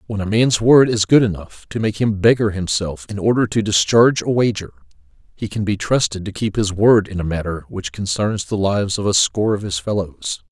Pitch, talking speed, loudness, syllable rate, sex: 105 Hz, 225 wpm, -18 LUFS, 5.4 syllables/s, male